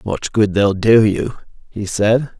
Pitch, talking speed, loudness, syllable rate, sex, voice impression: 105 Hz, 175 wpm, -16 LUFS, 3.7 syllables/s, male, masculine, middle-aged, slightly weak, muffled, halting, slightly calm, slightly mature, friendly, slightly reassuring, kind, slightly modest